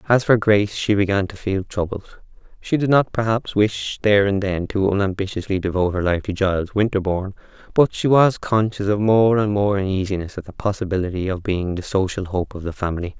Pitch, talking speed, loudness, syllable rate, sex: 100 Hz, 200 wpm, -20 LUFS, 5.7 syllables/s, male